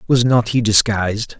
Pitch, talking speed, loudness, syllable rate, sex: 110 Hz, 170 wpm, -15 LUFS, 4.9 syllables/s, male